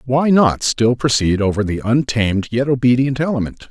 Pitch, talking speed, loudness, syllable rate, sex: 120 Hz, 160 wpm, -16 LUFS, 5.1 syllables/s, male